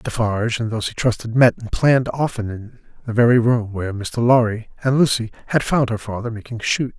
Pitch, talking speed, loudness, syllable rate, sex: 115 Hz, 205 wpm, -19 LUFS, 5.8 syllables/s, male